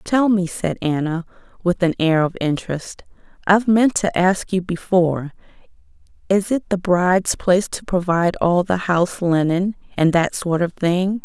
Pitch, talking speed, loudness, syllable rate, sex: 180 Hz, 165 wpm, -19 LUFS, 4.7 syllables/s, female